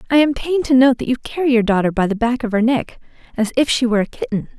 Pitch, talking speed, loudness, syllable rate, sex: 250 Hz, 290 wpm, -17 LUFS, 7.0 syllables/s, female